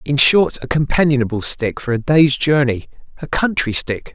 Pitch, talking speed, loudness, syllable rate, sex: 140 Hz, 175 wpm, -16 LUFS, 4.8 syllables/s, male